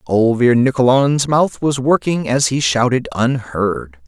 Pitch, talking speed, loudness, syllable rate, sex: 125 Hz, 130 wpm, -15 LUFS, 3.9 syllables/s, male